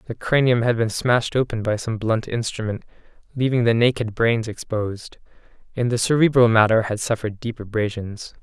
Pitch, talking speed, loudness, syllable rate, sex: 115 Hz, 165 wpm, -21 LUFS, 5.5 syllables/s, male